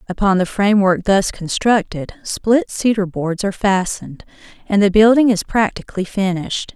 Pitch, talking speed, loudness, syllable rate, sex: 195 Hz, 140 wpm, -16 LUFS, 5.2 syllables/s, female